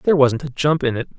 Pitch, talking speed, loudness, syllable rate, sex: 140 Hz, 305 wpm, -19 LUFS, 7.2 syllables/s, male